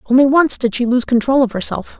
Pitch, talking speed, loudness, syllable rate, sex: 255 Hz, 240 wpm, -14 LUFS, 5.9 syllables/s, female